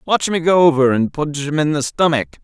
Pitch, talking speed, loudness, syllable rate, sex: 155 Hz, 245 wpm, -16 LUFS, 5.3 syllables/s, male